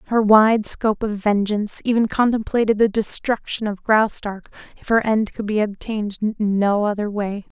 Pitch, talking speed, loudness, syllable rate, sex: 210 Hz, 165 wpm, -20 LUFS, 5.0 syllables/s, female